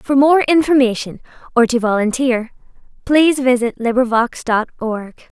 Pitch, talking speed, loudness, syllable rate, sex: 250 Hz, 125 wpm, -16 LUFS, 4.9 syllables/s, female